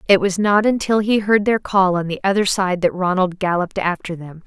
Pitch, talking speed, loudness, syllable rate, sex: 190 Hz, 230 wpm, -18 LUFS, 5.4 syllables/s, female